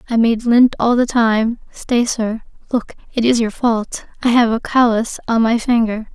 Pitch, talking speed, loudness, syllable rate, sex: 230 Hz, 195 wpm, -16 LUFS, 4.4 syllables/s, female